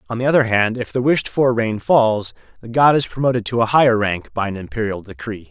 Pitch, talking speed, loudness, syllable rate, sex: 115 Hz, 240 wpm, -18 LUFS, 5.8 syllables/s, male